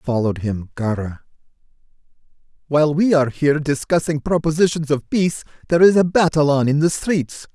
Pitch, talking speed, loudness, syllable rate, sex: 150 Hz, 150 wpm, -18 LUFS, 5.8 syllables/s, male